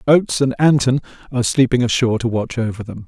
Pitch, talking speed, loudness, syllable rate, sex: 125 Hz, 195 wpm, -17 LUFS, 6.7 syllables/s, male